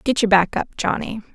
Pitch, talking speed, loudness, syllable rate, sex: 215 Hz, 225 wpm, -19 LUFS, 5.7 syllables/s, female